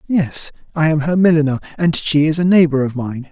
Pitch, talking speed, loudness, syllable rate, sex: 155 Hz, 215 wpm, -16 LUFS, 5.5 syllables/s, male